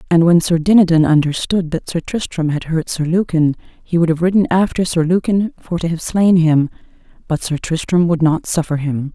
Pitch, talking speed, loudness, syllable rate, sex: 170 Hz, 205 wpm, -16 LUFS, 5.2 syllables/s, female